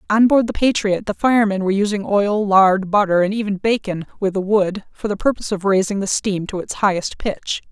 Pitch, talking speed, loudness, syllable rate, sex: 200 Hz, 220 wpm, -18 LUFS, 5.5 syllables/s, female